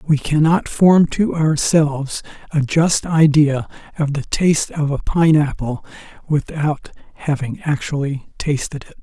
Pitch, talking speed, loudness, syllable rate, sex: 150 Hz, 135 wpm, -18 LUFS, 4.2 syllables/s, male